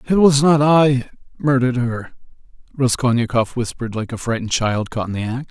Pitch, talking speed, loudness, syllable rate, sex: 125 Hz, 175 wpm, -18 LUFS, 5.6 syllables/s, male